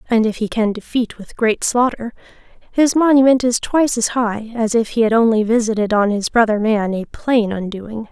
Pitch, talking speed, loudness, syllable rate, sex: 225 Hz, 200 wpm, -17 LUFS, 5.0 syllables/s, female